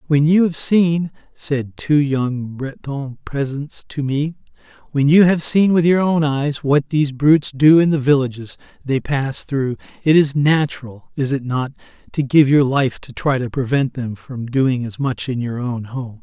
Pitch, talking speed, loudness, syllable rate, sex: 140 Hz, 190 wpm, -18 LUFS, 4.3 syllables/s, male